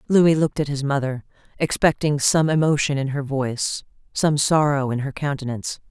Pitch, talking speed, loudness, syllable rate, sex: 140 Hz, 165 wpm, -21 LUFS, 5.4 syllables/s, female